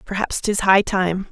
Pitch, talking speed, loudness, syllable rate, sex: 195 Hz, 180 wpm, -18 LUFS, 4.1 syllables/s, female